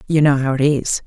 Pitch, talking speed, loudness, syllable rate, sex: 140 Hz, 280 wpm, -16 LUFS, 5.7 syllables/s, female